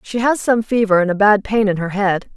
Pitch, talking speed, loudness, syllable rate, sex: 205 Hz, 280 wpm, -16 LUFS, 5.4 syllables/s, female